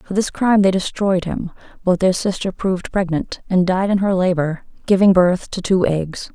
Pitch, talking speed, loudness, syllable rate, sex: 185 Hz, 200 wpm, -18 LUFS, 4.9 syllables/s, female